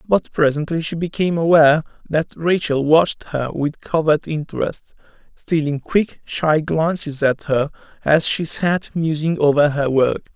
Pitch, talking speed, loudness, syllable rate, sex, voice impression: 155 Hz, 145 wpm, -18 LUFS, 4.4 syllables/s, male, masculine, adult-like, slightly middle-aged, slightly thick, relaxed, slightly weak, slightly dark, slightly hard, slightly muffled, slightly halting, slightly cool, intellectual, very sincere, very calm, friendly, unique, elegant, slightly sweet, very kind, very modest